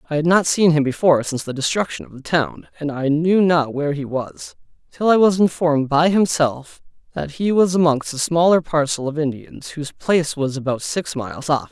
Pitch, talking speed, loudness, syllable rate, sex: 155 Hz, 210 wpm, -19 LUFS, 5.4 syllables/s, male